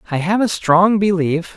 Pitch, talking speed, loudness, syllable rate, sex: 185 Hz, 190 wpm, -16 LUFS, 4.5 syllables/s, male